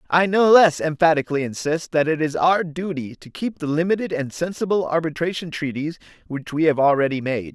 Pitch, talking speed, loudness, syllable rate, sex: 160 Hz, 185 wpm, -20 LUFS, 5.5 syllables/s, male